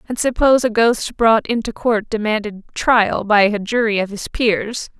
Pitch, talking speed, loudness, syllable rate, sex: 220 Hz, 180 wpm, -17 LUFS, 4.5 syllables/s, female